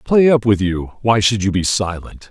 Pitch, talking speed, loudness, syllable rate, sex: 105 Hz, 235 wpm, -16 LUFS, 4.8 syllables/s, male